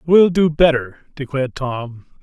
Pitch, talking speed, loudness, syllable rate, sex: 140 Hz, 135 wpm, -17 LUFS, 4.3 syllables/s, male